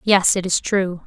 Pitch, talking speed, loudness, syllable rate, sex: 185 Hz, 225 wpm, -18 LUFS, 4.2 syllables/s, female